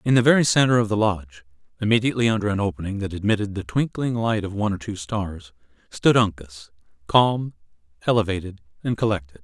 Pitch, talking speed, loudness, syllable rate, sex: 100 Hz, 170 wpm, -22 LUFS, 6.2 syllables/s, male